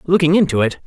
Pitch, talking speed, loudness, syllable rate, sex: 160 Hz, 205 wpm, -15 LUFS, 6.8 syllables/s, male